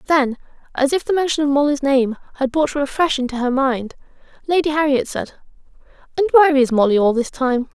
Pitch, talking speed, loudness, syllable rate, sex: 280 Hz, 185 wpm, -18 LUFS, 5.8 syllables/s, female